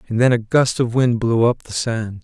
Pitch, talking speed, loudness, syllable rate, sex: 120 Hz, 270 wpm, -18 LUFS, 4.9 syllables/s, male